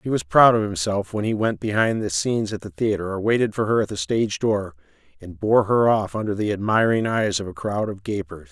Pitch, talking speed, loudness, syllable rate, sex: 105 Hz, 245 wpm, -21 LUFS, 5.6 syllables/s, male